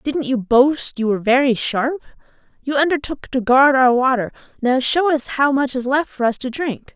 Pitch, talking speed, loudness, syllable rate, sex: 265 Hz, 205 wpm, -17 LUFS, 4.9 syllables/s, female